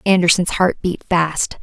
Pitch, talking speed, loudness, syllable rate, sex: 180 Hz, 145 wpm, -17 LUFS, 4.1 syllables/s, female